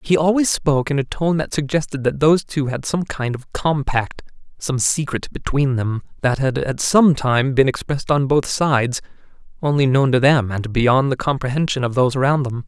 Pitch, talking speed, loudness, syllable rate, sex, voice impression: 140 Hz, 200 wpm, -19 LUFS, 5.2 syllables/s, male, masculine, slightly young, slightly adult-like, slightly thick, very tensed, powerful, bright, hard, very clear, fluent, cool, slightly intellectual, very refreshing, sincere, slightly calm, friendly, reassuring, wild, lively, strict, intense